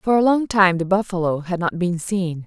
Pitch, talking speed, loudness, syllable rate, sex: 185 Hz, 245 wpm, -20 LUFS, 4.9 syllables/s, female